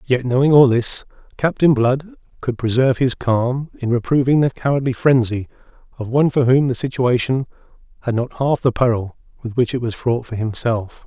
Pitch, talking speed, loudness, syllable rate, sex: 125 Hz, 180 wpm, -18 LUFS, 5.2 syllables/s, male